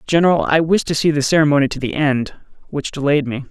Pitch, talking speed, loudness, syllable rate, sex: 145 Hz, 220 wpm, -17 LUFS, 6.2 syllables/s, male